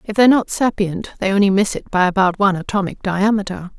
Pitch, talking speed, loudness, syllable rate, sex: 200 Hz, 205 wpm, -17 LUFS, 6.2 syllables/s, female